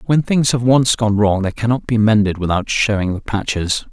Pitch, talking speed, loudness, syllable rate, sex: 110 Hz, 215 wpm, -16 LUFS, 5.1 syllables/s, male